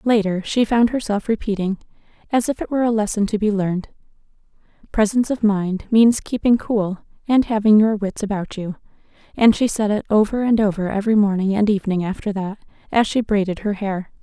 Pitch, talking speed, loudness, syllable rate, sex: 210 Hz, 185 wpm, -19 LUFS, 5.8 syllables/s, female